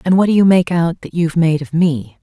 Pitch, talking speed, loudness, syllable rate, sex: 165 Hz, 295 wpm, -15 LUFS, 5.6 syllables/s, female